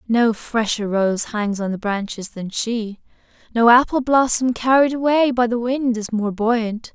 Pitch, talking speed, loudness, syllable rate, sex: 230 Hz, 165 wpm, -19 LUFS, 4.2 syllables/s, female